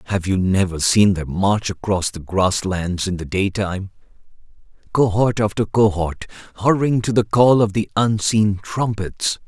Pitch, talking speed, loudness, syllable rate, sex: 100 Hz, 150 wpm, -19 LUFS, 4.4 syllables/s, male